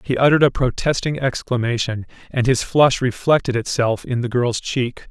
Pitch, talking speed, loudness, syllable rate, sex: 125 Hz, 165 wpm, -19 LUFS, 5.0 syllables/s, male